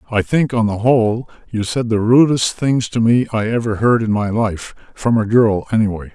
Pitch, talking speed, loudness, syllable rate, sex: 110 Hz, 205 wpm, -16 LUFS, 5.0 syllables/s, male